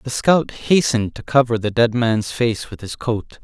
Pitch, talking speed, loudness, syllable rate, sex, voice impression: 115 Hz, 210 wpm, -19 LUFS, 4.4 syllables/s, male, masculine, slightly young, slightly thick, tensed, slightly weak, bright, slightly soft, very clear, fluent, cool, intellectual, very refreshing, sincere, calm, very friendly, very reassuring, slightly unique, elegant, wild, slightly sweet, lively, kind, slightly modest